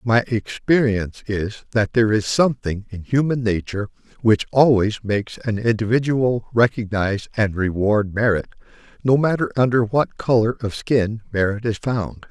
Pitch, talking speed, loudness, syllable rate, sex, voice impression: 110 Hz, 140 wpm, -20 LUFS, 4.9 syllables/s, male, masculine, middle-aged, thick, tensed, slightly powerful, slightly halting, slightly calm, friendly, reassuring, wild, lively, slightly strict